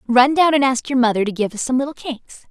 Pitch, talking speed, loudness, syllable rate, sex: 255 Hz, 290 wpm, -17 LUFS, 6.5 syllables/s, female